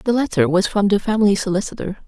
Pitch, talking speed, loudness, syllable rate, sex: 205 Hz, 200 wpm, -18 LUFS, 6.4 syllables/s, female